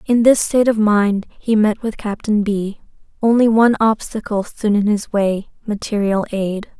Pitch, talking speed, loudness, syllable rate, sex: 210 Hz, 160 wpm, -17 LUFS, 4.6 syllables/s, female